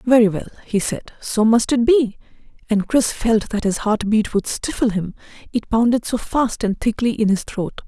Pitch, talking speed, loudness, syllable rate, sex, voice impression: 225 Hz, 200 wpm, -19 LUFS, 4.8 syllables/s, female, very feminine, adult-like, slightly middle-aged, thin, tensed, slightly powerful, bright, hard, clear, slightly fluent, cute, very intellectual, refreshing, sincere, slightly calm, friendly, reassuring, very unique, slightly elegant, wild, slightly sweet, lively, strict, intense, sharp